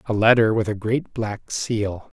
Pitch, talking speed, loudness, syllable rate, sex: 110 Hz, 190 wpm, -21 LUFS, 4.0 syllables/s, male